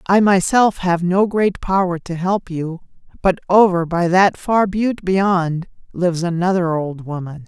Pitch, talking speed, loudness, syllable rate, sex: 180 Hz, 160 wpm, -17 LUFS, 4.2 syllables/s, female